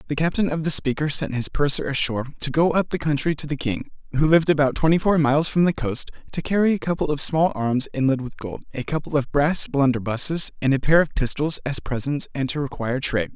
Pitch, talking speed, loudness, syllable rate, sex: 145 Hz, 235 wpm, -22 LUFS, 6.1 syllables/s, male